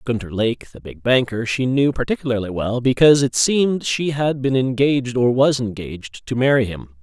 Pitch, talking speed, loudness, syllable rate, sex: 125 Hz, 190 wpm, -19 LUFS, 5.3 syllables/s, male